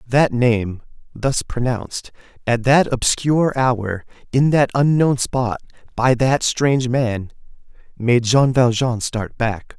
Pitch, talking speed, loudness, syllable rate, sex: 125 Hz, 130 wpm, -18 LUFS, 3.7 syllables/s, male